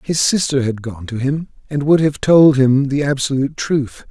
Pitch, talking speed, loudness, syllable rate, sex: 140 Hz, 205 wpm, -16 LUFS, 4.8 syllables/s, male